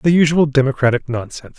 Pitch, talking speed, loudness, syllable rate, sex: 140 Hz, 150 wpm, -16 LUFS, 6.5 syllables/s, male